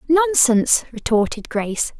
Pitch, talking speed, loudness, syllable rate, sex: 260 Hz, 90 wpm, -18 LUFS, 4.8 syllables/s, female